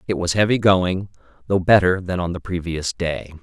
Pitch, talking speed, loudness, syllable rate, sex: 90 Hz, 195 wpm, -20 LUFS, 5.0 syllables/s, male